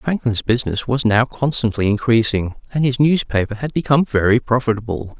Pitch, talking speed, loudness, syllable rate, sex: 120 Hz, 150 wpm, -18 LUFS, 5.6 syllables/s, male